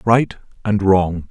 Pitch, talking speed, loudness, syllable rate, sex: 100 Hz, 140 wpm, -17 LUFS, 3.2 syllables/s, male